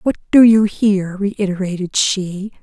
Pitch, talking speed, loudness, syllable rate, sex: 200 Hz, 135 wpm, -15 LUFS, 3.9 syllables/s, female